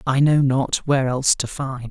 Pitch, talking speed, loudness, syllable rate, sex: 135 Hz, 220 wpm, -19 LUFS, 4.9 syllables/s, male